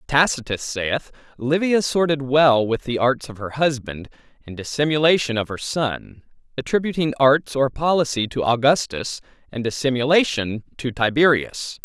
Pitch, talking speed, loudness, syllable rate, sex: 135 Hz, 130 wpm, -20 LUFS, 4.7 syllables/s, male